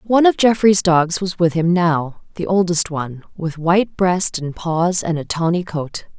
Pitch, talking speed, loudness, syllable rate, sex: 175 Hz, 185 wpm, -17 LUFS, 4.5 syllables/s, female